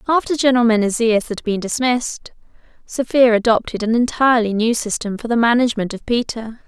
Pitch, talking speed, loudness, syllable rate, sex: 230 Hz, 155 wpm, -17 LUFS, 5.9 syllables/s, female